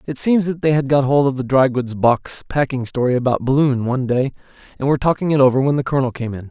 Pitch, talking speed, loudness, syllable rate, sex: 135 Hz, 260 wpm, -18 LUFS, 6.4 syllables/s, male